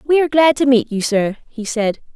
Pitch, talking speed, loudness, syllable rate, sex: 250 Hz, 250 wpm, -16 LUFS, 5.4 syllables/s, female